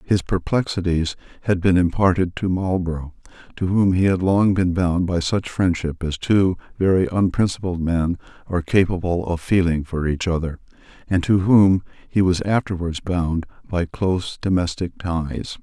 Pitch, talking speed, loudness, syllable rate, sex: 90 Hz, 155 wpm, -21 LUFS, 4.7 syllables/s, male